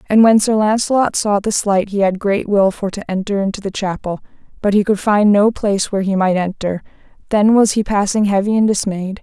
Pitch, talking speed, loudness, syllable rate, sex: 205 Hz, 220 wpm, -16 LUFS, 5.5 syllables/s, female